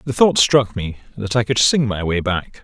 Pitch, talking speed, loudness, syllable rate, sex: 110 Hz, 250 wpm, -17 LUFS, 4.9 syllables/s, male